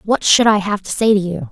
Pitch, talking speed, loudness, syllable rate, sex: 205 Hz, 315 wpm, -15 LUFS, 5.7 syllables/s, female